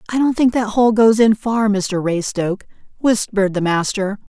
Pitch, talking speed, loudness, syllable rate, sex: 210 Hz, 180 wpm, -17 LUFS, 5.0 syllables/s, female